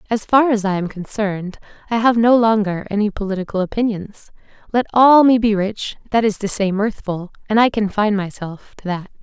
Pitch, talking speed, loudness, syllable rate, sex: 210 Hz, 190 wpm, -17 LUFS, 5.4 syllables/s, female